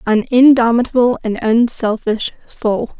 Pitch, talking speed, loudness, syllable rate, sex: 230 Hz, 100 wpm, -14 LUFS, 4.2 syllables/s, female